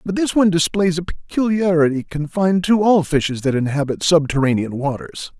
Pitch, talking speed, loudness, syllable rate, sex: 165 Hz, 155 wpm, -18 LUFS, 5.5 syllables/s, male